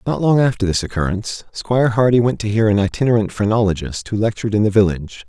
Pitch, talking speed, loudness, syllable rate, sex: 105 Hz, 205 wpm, -17 LUFS, 6.7 syllables/s, male